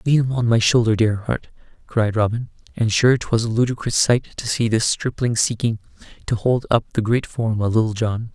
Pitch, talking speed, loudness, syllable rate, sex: 115 Hz, 200 wpm, -20 LUFS, 5.0 syllables/s, male